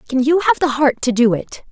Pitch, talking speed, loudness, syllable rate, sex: 260 Hz, 280 wpm, -16 LUFS, 5.5 syllables/s, female